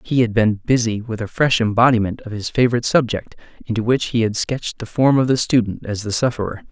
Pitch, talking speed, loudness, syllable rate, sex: 115 Hz, 225 wpm, -19 LUFS, 6.1 syllables/s, male